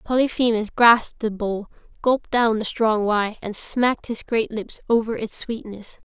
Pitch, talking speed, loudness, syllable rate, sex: 225 Hz, 165 wpm, -22 LUFS, 4.7 syllables/s, female